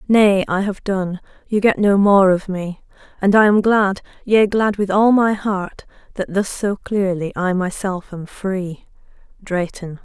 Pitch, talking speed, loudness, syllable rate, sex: 195 Hz, 175 wpm, -18 LUFS, 4.0 syllables/s, female